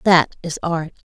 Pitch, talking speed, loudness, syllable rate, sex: 165 Hz, 160 wpm, -20 LUFS, 4.0 syllables/s, female